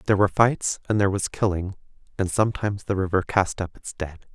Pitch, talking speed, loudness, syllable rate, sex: 95 Hz, 205 wpm, -24 LUFS, 6.3 syllables/s, male